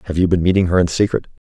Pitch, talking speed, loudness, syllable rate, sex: 90 Hz, 285 wpm, -17 LUFS, 8.0 syllables/s, male